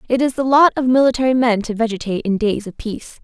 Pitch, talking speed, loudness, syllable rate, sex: 240 Hz, 240 wpm, -17 LUFS, 6.6 syllables/s, female